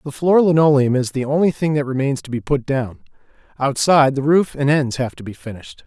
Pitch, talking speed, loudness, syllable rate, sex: 140 Hz, 225 wpm, -17 LUFS, 5.8 syllables/s, male